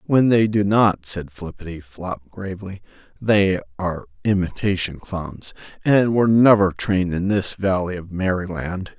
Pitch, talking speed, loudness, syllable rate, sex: 95 Hz, 135 wpm, -20 LUFS, 4.5 syllables/s, male